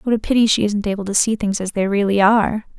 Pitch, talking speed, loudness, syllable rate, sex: 210 Hz, 280 wpm, -17 LUFS, 6.5 syllables/s, female